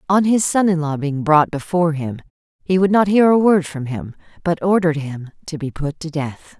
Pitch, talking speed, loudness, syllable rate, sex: 165 Hz, 225 wpm, -18 LUFS, 5.2 syllables/s, female